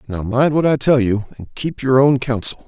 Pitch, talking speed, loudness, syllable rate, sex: 125 Hz, 245 wpm, -17 LUFS, 5.0 syllables/s, male